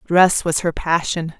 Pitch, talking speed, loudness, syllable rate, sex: 165 Hz, 170 wpm, -18 LUFS, 4.0 syllables/s, female